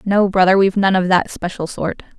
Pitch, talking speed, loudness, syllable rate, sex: 190 Hz, 220 wpm, -16 LUFS, 5.6 syllables/s, female